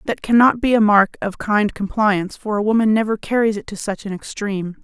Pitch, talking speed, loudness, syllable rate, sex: 210 Hz, 225 wpm, -18 LUFS, 5.7 syllables/s, female